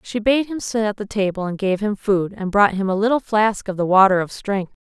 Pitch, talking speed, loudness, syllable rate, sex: 205 Hz, 275 wpm, -19 LUFS, 5.4 syllables/s, female